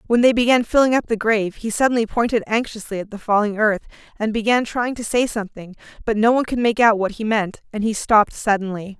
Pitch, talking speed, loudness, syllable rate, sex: 220 Hz, 225 wpm, -19 LUFS, 6.2 syllables/s, female